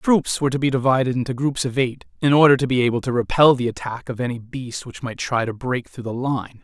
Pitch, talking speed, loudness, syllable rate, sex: 130 Hz, 270 wpm, -21 LUFS, 6.1 syllables/s, male